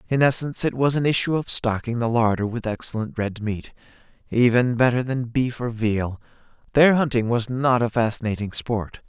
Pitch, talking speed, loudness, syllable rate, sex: 120 Hz, 180 wpm, -22 LUFS, 5.2 syllables/s, male